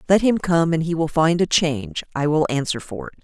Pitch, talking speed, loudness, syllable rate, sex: 160 Hz, 260 wpm, -20 LUFS, 5.5 syllables/s, female